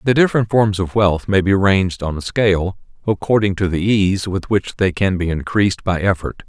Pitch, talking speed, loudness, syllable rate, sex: 95 Hz, 215 wpm, -17 LUFS, 5.3 syllables/s, male